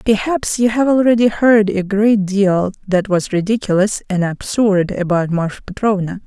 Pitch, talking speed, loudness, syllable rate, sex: 200 Hz, 155 wpm, -16 LUFS, 4.5 syllables/s, female